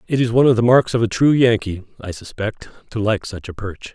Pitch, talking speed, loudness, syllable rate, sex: 110 Hz, 260 wpm, -18 LUFS, 5.8 syllables/s, male